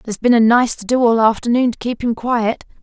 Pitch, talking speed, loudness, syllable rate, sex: 235 Hz, 255 wpm, -16 LUFS, 5.9 syllables/s, female